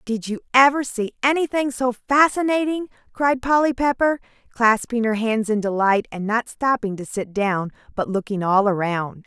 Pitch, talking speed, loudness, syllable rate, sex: 235 Hz, 160 wpm, -21 LUFS, 4.8 syllables/s, female